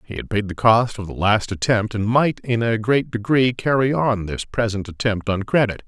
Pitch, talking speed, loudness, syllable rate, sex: 110 Hz, 225 wpm, -20 LUFS, 4.9 syllables/s, male